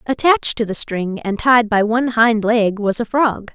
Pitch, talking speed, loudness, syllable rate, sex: 225 Hz, 220 wpm, -16 LUFS, 4.7 syllables/s, female